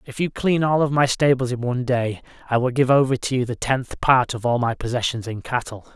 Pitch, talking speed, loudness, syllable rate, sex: 125 Hz, 250 wpm, -21 LUFS, 5.6 syllables/s, male